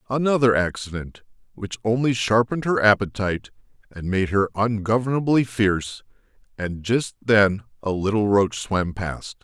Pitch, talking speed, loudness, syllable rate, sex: 105 Hz, 125 wpm, -22 LUFS, 4.7 syllables/s, male